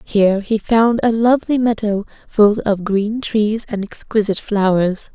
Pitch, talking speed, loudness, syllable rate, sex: 215 Hz, 150 wpm, -17 LUFS, 4.5 syllables/s, female